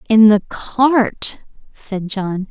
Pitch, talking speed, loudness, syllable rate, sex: 215 Hz, 120 wpm, -16 LUFS, 2.6 syllables/s, female